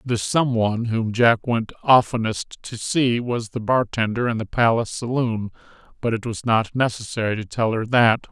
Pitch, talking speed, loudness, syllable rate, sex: 115 Hz, 180 wpm, -21 LUFS, 4.8 syllables/s, male